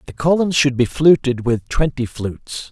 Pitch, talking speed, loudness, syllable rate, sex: 135 Hz, 175 wpm, -17 LUFS, 4.7 syllables/s, male